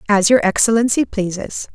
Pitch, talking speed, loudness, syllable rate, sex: 210 Hz, 140 wpm, -16 LUFS, 5.2 syllables/s, female